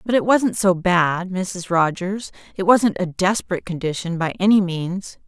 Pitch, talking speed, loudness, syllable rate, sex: 185 Hz, 170 wpm, -20 LUFS, 4.5 syllables/s, female